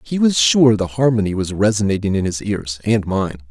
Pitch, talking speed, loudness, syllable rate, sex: 105 Hz, 205 wpm, -17 LUFS, 5.3 syllables/s, male